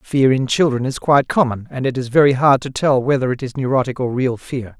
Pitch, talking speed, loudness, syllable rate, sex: 130 Hz, 250 wpm, -17 LUFS, 5.7 syllables/s, male